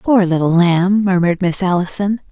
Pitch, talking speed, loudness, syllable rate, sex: 185 Hz, 155 wpm, -15 LUFS, 5.0 syllables/s, female